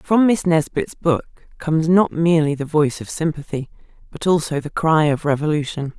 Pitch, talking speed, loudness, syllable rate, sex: 155 Hz, 170 wpm, -19 LUFS, 5.2 syllables/s, female